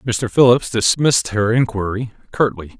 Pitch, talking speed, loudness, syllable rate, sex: 115 Hz, 130 wpm, -17 LUFS, 4.8 syllables/s, male